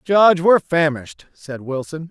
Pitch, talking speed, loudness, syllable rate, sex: 160 Hz, 140 wpm, -17 LUFS, 5.1 syllables/s, male